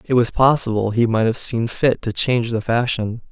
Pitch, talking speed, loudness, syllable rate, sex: 115 Hz, 215 wpm, -18 LUFS, 5.1 syllables/s, male